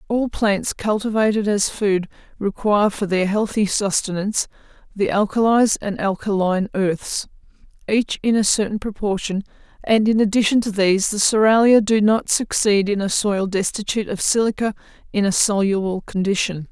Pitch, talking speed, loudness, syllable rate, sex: 205 Hz, 145 wpm, -19 LUFS, 5.0 syllables/s, female